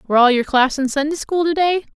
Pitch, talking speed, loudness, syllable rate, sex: 290 Hz, 245 wpm, -17 LUFS, 6.0 syllables/s, female